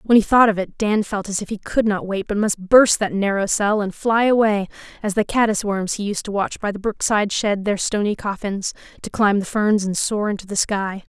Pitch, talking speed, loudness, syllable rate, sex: 205 Hz, 250 wpm, -20 LUFS, 5.2 syllables/s, female